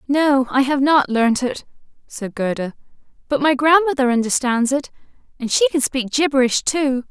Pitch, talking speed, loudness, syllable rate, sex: 265 Hz, 160 wpm, -18 LUFS, 4.8 syllables/s, female